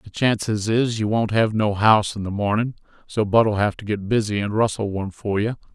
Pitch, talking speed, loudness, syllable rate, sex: 105 Hz, 230 wpm, -21 LUFS, 5.4 syllables/s, male